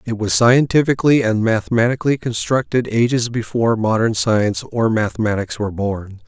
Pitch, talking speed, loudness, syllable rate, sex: 115 Hz, 135 wpm, -17 LUFS, 5.5 syllables/s, male